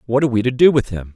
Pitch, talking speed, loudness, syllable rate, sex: 120 Hz, 365 wpm, -16 LUFS, 7.9 syllables/s, male